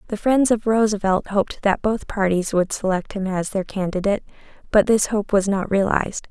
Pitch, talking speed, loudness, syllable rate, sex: 200 Hz, 190 wpm, -20 LUFS, 5.4 syllables/s, female